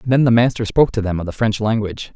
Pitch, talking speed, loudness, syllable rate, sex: 110 Hz, 305 wpm, -17 LUFS, 7.4 syllables/s, male